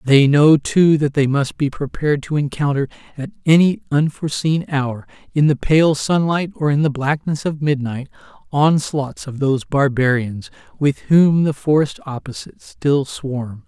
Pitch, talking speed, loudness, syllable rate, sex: 145 Hz, 155 wpm, -18 LUFS, 4.5 syllables/s, male